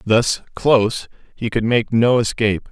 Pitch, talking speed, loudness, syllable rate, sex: 115 Hz, 155 wpm, -18 LUFS, 4.5 syllables/s, male